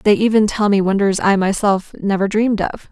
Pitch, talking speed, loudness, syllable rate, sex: 200 Hz, 205 wpm, -16 LUFS, 5.5 syllables/s, female